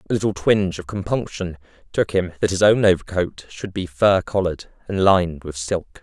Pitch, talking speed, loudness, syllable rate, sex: 95 Hz, 190 wpm, -20 LUFS, 5.4 syllables/s, male